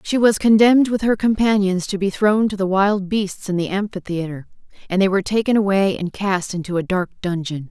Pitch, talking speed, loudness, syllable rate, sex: 195 Hz, 210 wpm, -19 LUFS, 5.5 syllables/s, female